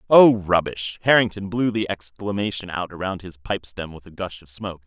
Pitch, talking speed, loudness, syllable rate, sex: 95 Hz, 195 wpm, -22 LUFS, 5.2 syllables/s, male